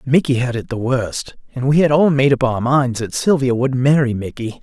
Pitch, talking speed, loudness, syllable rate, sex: 130 Hz, 235 wpm, -17 LUFS, 5.0 syllables/s, male